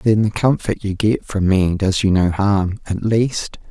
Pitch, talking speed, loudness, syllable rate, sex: 100 Hz, 210 wpm, -18 LUFS, 4.0 syllables/s, male